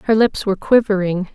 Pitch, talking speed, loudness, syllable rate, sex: 205 Hz, 180 wpm, -17 LUFS, 6.1 syllables/s, female